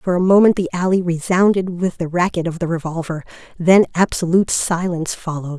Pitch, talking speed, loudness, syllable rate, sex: 175 Hz, 170 wpm, -17 LUFS, 5.9 syllables/s, female